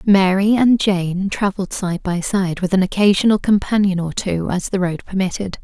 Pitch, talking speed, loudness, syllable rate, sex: 190 Hz, 180 wpm, -18 LUFS, 4.9 syllables/s, female